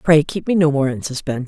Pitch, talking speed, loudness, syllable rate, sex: 145 Hz, 285 wpm, -18 LUFS, 6.3 syllables/s, female